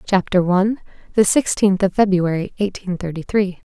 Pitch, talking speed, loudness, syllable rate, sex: 190 Hz, 130 wpm, -18 LUFS, 5.1 syllables/s, female